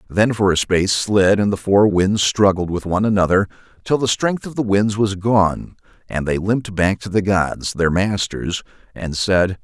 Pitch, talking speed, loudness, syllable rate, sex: 100 Hz, 200 wpm, -18 LUFS, 4.6 syllables/s, male